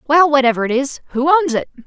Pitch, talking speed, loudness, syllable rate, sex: 280 Hz, 225 wpm, -15 LUFS, 5.8 syllables/s, female